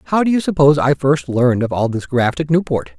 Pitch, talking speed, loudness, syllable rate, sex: 140 Hz, 260 wpm, -16 LUFS, 5.9 syllables/s, male